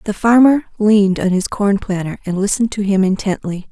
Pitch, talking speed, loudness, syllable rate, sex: 200 Hz, 195 wpm, -15 LUFS, 5.7 syllables/s, female